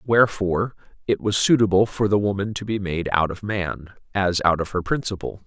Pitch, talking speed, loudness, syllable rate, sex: 100 Hz, 200 wpm, -22 LUFS, 5.5 syllables/s, male